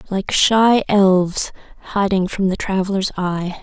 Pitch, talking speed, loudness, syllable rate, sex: 195 Hz, 130 wpm, -17 LUFS, 4.1 syllables/s, female